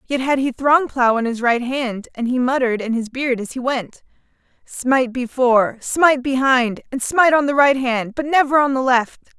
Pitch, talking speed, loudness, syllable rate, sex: 255 Hz, 210 wpm, -18 LUFS, 5.0 syllables/s, female